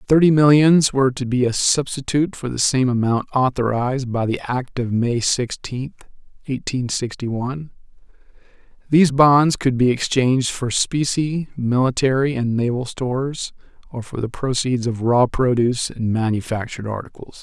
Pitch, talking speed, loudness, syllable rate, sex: 130 Hz, 145 wpm, -19 LUFS, 4.9 syllables/s, male